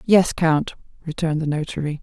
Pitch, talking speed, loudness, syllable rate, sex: 160 Hz, 150 wpm, -21 LUFS, 5.4 syllables/s, female